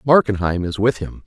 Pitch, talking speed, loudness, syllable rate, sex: 105 Hz, 190 wpm, -19 LUFS, 5.3 syllables/s, male